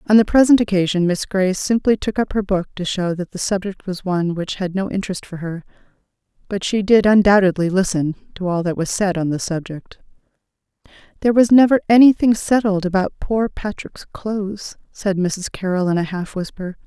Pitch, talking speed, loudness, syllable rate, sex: 195 Hz, 190 wpm, -18 LUFS, 5.5 syllables/s, female